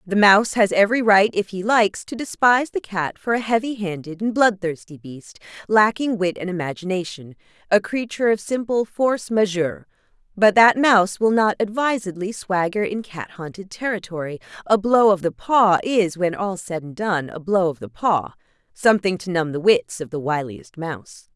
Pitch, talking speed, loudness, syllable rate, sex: 200 Hz, 180 wpm, -20 LUFS, 5.2 syllables/s, female